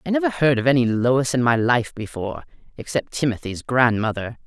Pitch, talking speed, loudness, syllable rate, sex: 130 Hz, 175 wpm, -21 LUFS, 5.5 syllables/s, female